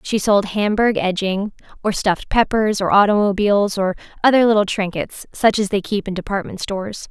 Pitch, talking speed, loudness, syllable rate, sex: 200 Hz, 170 wpm, -18 LUFS, 5.3 syllables/s, female